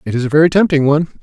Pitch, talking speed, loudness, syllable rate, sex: 150 Hz, 295 wpm, -13 LUFS, 8.9 syllables/s, male